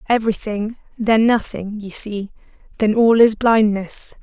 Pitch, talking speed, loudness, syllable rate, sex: 220 Hz, 130 wpm, -18 LUFS, 4.3 syllables/s, female